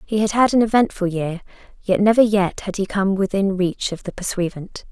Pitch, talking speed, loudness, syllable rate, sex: 195 Hz, 210 wpm, -19 LUFS, 5.2 syllables/s, female